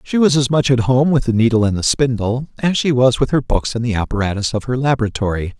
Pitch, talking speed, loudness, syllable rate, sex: 125 Hz, 255 wpm, -16 LUFS, 6.1 syllables/s, male